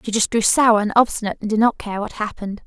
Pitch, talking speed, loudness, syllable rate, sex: 215 Hz, 270 wpm, -18 LUFS, 6.9 syllables/s, female